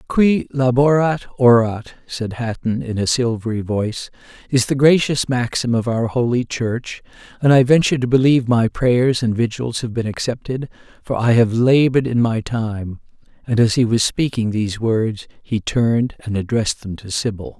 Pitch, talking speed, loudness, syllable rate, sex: 120 Hz, 170 wpm, -18 LUFS, 4.9 syllables/s, male